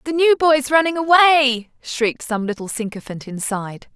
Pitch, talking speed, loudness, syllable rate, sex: 260 Hz, 150 wpm, -17 LUFS, 5.9 syllables/s, female